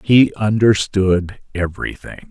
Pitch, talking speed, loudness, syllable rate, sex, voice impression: 95 Hz, 80 wpm, -17 LUFS, 3.8 syllables/s, male, masculine, very adult-like, slightly thick, slightly refreshing, sincere